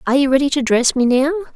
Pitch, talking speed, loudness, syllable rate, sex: 275 Hz, 270 wpm, -16 LUFS, 7.6 syllables/s, female